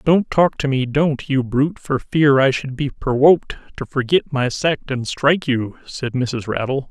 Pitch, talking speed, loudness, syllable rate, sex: 135 Hz, 200 wpm, -18 LUFS, 4.5 syllables/s, male